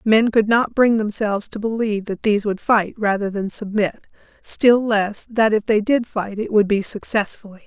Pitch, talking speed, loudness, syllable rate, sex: 215 Hz, 195 wpm, -19 LUFS, 4.9 syllables/s, female